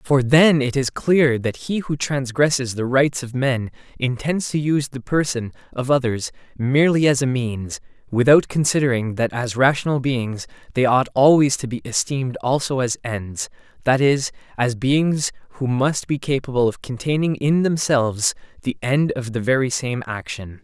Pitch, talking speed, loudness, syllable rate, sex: 130 Hz, 170 wpm, -20 LUFS, 4.7 syllables/s, male